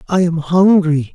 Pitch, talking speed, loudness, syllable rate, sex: 170 Hz, 155 wpm, -14 LUFS, 4.1 syllables/s, male